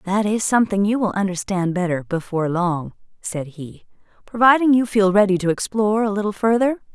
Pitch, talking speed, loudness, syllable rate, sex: 200 Hz, 175 wpm, -19 LUFS, 5.7 syllables/s, female